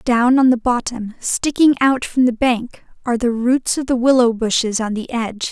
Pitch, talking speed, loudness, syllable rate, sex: 240 Hz, 205 wpm, -17 LUFS, 4.9 syllables/s, female